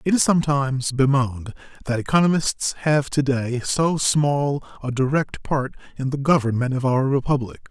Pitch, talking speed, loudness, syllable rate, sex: 135 Hz, 155 wpm, -21 LUFS, 4.9 syllables/s, male